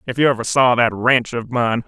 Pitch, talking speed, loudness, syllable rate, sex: 120 Hz, 255 wpm, -17 LUFS, 5.2 syllables/s, male